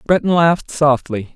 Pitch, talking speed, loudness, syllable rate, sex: 150 Hz, 135 wpm, -15 LUFS, 5.0 syllables/s, male